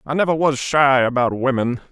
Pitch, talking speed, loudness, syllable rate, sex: 135 Hz, 190 wpm, -18 LUFS, 5.2 syllables/s, male